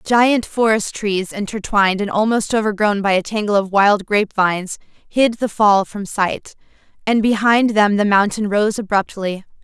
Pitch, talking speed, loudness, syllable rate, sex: 205 Hz, 155 wpm, -17 LUFS, 4.6 syllables/s, female